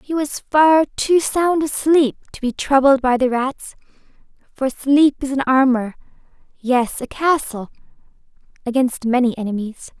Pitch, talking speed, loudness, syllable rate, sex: 265 Hz, 125 wpm, -18 LUFS, 4.3 syllables/s, female